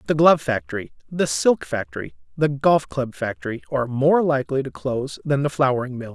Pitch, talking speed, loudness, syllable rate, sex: 130 Hz, 185 wpm, -22 LUFS, 5.7 syllables/s, male